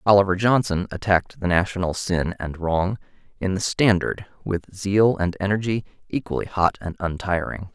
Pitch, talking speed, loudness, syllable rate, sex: 95 Hz, 145 wpm, -23 LUFS, 5.0 syllables/s, male